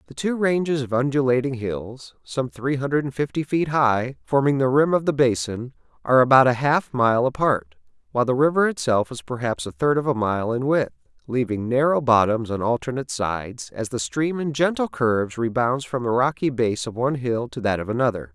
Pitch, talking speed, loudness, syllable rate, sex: 130 Hz, 205 wpm, -22 LUFS, 5.4 syllables/s, male